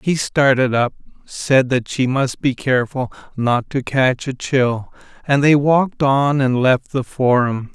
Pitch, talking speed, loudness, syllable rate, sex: 130 Hz, 170 wpm, -17 LUFS, 4.0 syllables/s, male